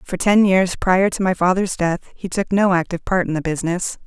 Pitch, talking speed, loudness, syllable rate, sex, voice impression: 180 Hz, 235 wpm, -18 LUFS, 5.6 syllables/s, female, very feminine, adult-like, clear, slightly fluent, slightly refreshing, sincere